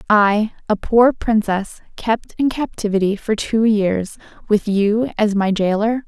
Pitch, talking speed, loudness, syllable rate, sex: 215 Hz, 150 wpm, -18 LUFS, 3.9 syllables/s, female